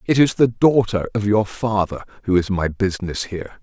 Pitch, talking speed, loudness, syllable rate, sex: 105 Hz, 200 wpm, -19 LUFS, 5.2 syllables/s, male